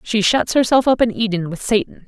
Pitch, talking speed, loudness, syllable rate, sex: 215 Hz, 230 wpm, -17 LUFS, 5.6 syllables/s, female